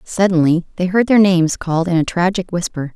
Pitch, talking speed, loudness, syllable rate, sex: 180 Hz, 205 wpm, -16 LUFS, 6.0 syllables/s, female